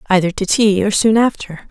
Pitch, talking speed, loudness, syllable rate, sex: 200 Hz, 210 wpm, -14 LUFS, 5.3 syllables/s, female